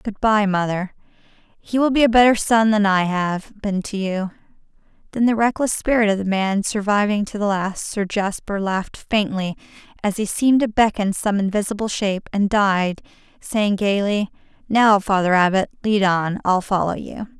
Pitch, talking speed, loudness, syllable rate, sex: 205 Hz, 175 wpm, -19 LUFS, 4.8 syllables/s, female